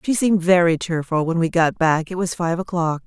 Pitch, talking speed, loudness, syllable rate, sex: 175 Hz, 235 wpm, -19 LUFS, 5.4 syllables/s, female